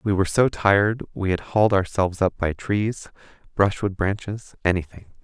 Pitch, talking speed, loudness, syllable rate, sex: 100 Hz, 160 wpm, -22 LUFS, 5.3 syllables/s, male